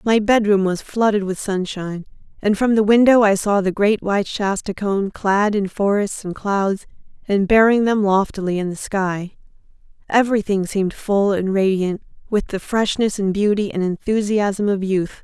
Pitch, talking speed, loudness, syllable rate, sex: 200 Hz, 170 wpm, -19 LUFS, 4.8 syllables/s, female